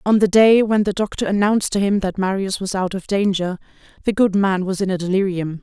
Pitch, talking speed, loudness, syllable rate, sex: 195 Hz, 235 wpm, -18 LUFS, 5.8 syllables/s, female